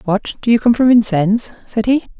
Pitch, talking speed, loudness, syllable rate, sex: 220 Hz, 220 wpm, -15 LUFS, 5.5 syllables/s, female